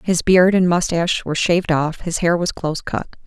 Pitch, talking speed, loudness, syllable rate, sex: 170 Hz, 220 wpm, -18 LUFS, 5.6 syllables/s, female